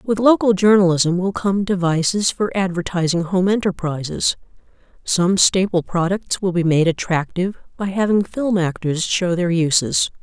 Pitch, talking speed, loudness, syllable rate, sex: 185 Hz, 140 wpm, -18 LUFS, 4.7 syllables/s, female